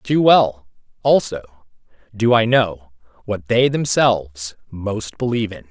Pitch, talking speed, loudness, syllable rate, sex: 110 Hz, 125 wpm, -18 LUFS, 3.9 syllables/s, male